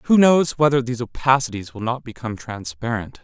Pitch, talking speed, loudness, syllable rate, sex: 125 Hz, 165 wpm, -20 LUFS, 5.6 syllables/s, male